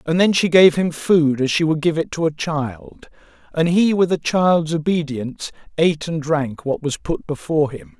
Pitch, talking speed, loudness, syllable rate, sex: 155 Hz, 210 wpm, -19 LUFS, 4.7 syllables/s, male